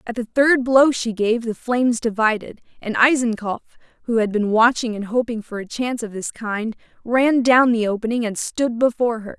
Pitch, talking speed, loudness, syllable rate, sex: 230 Hz, 200 wpm, -19 LUFS, 5.2 syllables/s, female